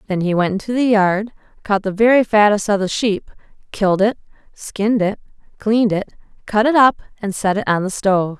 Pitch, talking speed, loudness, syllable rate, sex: 205 Hz, 200 wpm, -17 LUFS, 5.5 syllables/s, female